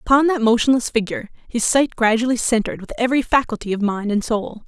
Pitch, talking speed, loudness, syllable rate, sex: 230 Hz, 195 wpm, -19 LUFS, 6.1 syllables/s, female